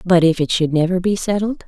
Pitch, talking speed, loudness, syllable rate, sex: 180 Hz, 250 wpm, -17 LUFS, 5.8 syllables/s, female